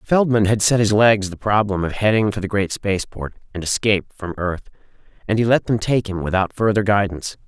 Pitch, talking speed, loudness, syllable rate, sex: 105 Hz, 210 wpm, -19 LUFS, 5.8 syllables/s, male